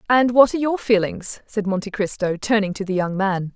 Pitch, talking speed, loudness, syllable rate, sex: 205 Hz, 220 wpm, -20 LUFS, 5.4 syllables/s, female